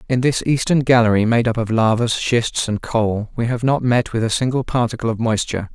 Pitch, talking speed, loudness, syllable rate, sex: 115 Hz, 220 wpm, -18 LUFS, 5.5 syllables/s, male